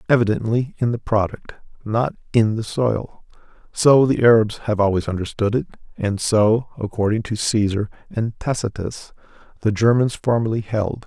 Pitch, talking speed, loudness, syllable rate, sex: 110 Hz, 140 wpm, -20 LUFS, 4.8 syllables/s, male